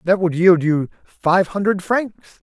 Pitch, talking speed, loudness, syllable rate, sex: 185 Hz, 165 wpm, -17 LUFS, 3.7 syllables/s, male